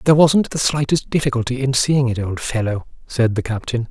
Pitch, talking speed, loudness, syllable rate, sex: 125 Hz, 200 wpm, -19 LUFS, 5.6 syllables/s, male